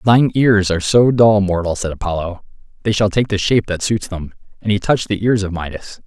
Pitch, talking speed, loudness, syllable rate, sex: 100 Hz, 240 wpm, -16 LUFS, 6.1 syllables/s, male